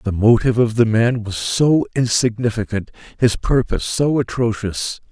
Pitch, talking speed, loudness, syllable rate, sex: 115 Hz, 140 wpm, -18 LUFS, 4.7 syllables/s, male